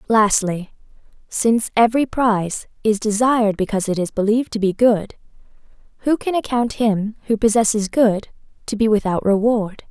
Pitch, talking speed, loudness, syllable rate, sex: 220 Hz, 145 wpm, -18 LUFS, 5.2 syllables/s, female